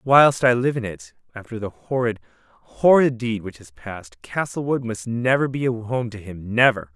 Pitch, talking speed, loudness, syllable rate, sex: 115 Hz, 180 wpm, -21 LUFS, 5.0 syllables/s, male